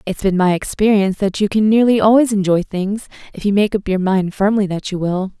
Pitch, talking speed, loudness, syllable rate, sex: 200 Hz, 235 wpm, -16 LUFS, 5.6 syllables/s, female